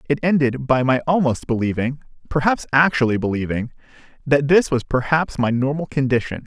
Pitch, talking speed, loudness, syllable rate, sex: 135 Hz, 150 wpm, -19 LUFS, 4.4 syllables/s, male